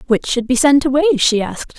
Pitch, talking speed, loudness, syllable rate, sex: 260 Hz, 235 wpm, -15 LUFS, 6.1 syllables/s, female